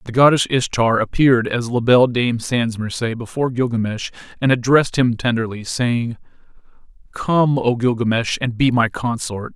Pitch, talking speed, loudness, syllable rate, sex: 120 Hz, 150 wpm, -18 LUFS, 5.0 syllables/s, male